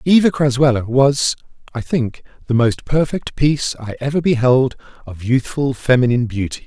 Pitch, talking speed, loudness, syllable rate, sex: 130 Hz, 145 wpm, -17 LUFS, 5.0 syllables/s, male